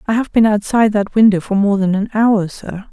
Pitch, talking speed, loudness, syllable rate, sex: 210 Hz, 245 wpm, -14 LUFS, 5.6 syllables/s, female